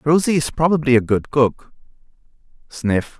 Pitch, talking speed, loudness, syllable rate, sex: 135 Hz, 130 wpm, -18 LUFS, 4.7 syllables/s, male